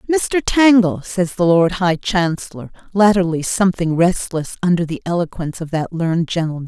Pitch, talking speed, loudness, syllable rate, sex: 175 Hz, 155 wpm, -17 LUFS, 5.1 syllables/s, female